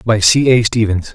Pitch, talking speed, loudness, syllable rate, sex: 115 Hz, 210 wpm, -12 LUFS, 4.9 syllables/s, male